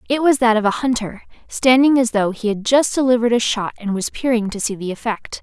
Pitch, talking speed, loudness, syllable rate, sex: 230 Hz, 245 wpm, -18 LUFS, 5.9 syllables/s, female